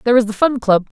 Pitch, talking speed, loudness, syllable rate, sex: 225 Hz, 305 wpm, -16 LUFS, 7.5 syllables/s, female